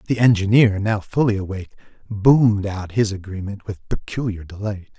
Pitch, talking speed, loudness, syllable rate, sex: 105 Hz, 145 wpm, -20 LUFS, 5.3 syllables/s, male